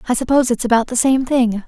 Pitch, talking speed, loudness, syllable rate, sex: 245 Hz, 250 wpm, -16 LUFS, 6.7 syllables/s, female